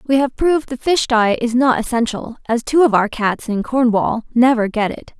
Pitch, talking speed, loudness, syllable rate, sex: 240 Hz, 220 wpm, -17 LUFS, 5.0 syllables/s, female